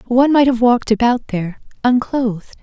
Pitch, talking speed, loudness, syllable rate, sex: 240 Hz, 160 wpm, -16 LUFS, 5.8 syllables/s, female